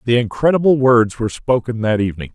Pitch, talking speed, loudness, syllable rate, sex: 120 Hz, 180 wpm, -16 LUFS, 6.3 syllables/s, male